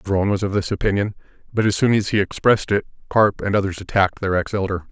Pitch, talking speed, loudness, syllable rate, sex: 100 Hz, 230 wpm, -20 LUFS, 6.4 syllables/s, male